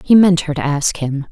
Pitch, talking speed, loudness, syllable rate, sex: 160 Hz, 275 wpm, -15 LUFS, 5.0 syllables/s, female